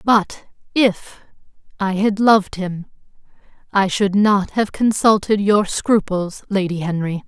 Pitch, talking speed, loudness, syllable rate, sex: 200 Hz, 105 wpm, -18 LUFS, 3.9 syllables/s, female